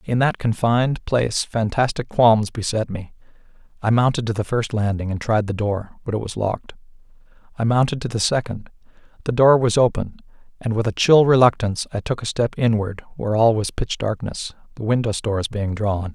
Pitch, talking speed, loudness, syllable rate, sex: 115 Hz, 190 wpm, -20 LUFS, 5.4 syllables/s, male